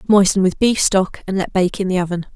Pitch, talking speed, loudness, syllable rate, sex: 190 Hz, 255 wpm, -17 LUFS, 5.7 syllables/s, female